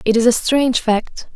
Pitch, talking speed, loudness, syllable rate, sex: 235 Hz, 220 wpm, -16 LUFS, 5.0 syllables/s, female